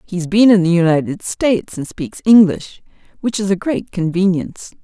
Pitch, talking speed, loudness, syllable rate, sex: 190 Hz, 185 wpm, -15 LUFS, 5.2 syllables/s, female